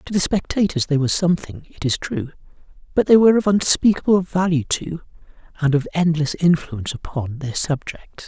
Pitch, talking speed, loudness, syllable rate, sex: 160 Hz, 165 wpm, -19 LUFS, 5.5 syllables/s, male